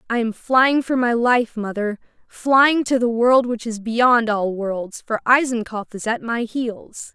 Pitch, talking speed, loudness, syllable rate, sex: 235 Hz, 185 wpm, -19 LUFS, 3.8 syllables/s, female